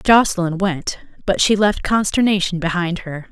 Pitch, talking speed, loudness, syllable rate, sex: 185 Hz, 145 wpm, -18 LUFS, 4.6 syllables/s, female